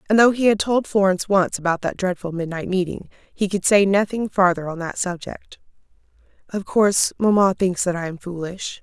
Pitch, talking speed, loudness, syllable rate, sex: 190 Hz, 190 wpm, -20 LUFS, 5.3 syllables/s, female